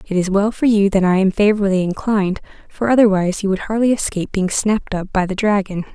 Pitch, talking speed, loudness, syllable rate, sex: 200 Hz, 220 wpm, -17 LUFS, 6.4 syllables/s, female